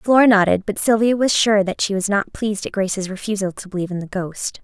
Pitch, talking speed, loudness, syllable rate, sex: 205 Hz, 245 wpm, -19 LUFS, 6.1 syllables/s, female